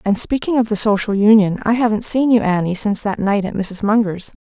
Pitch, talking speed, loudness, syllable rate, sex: 210 Hz, 230 wpm, -16 LUFS, 5.7 syllables/s, female